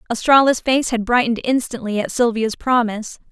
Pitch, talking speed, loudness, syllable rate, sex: 235 Hz, 145 wpm, -18 LUFS, 5.7 syllables/s, female